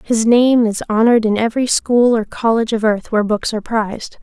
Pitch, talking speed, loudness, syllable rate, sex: 225 Hz, 215 wpm, -15 LUFS, 5.9 syllables/s, female